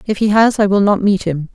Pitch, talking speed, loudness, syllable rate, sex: 200 Hz, 310 wpm, -14 LUFS, 5.7 syllables/s, female